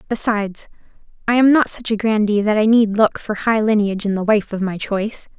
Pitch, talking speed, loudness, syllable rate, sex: 215 Hz, 225 wpm, -17 LUFS, 5.7 syllables/s, female